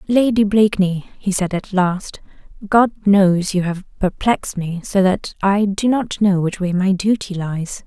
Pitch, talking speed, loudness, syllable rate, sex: 195 Hz, 175 wpm, -18 LUFS, 4.3 syllables/s, female